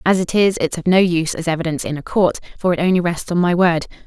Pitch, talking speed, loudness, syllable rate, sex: 170 Hz, 280 wpm, -18 LUFS, 6.8 syllables/s, female